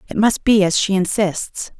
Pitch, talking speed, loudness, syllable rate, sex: 195 Hz, 200 wpm, -17 LUFS, 4.4 syllables/s, female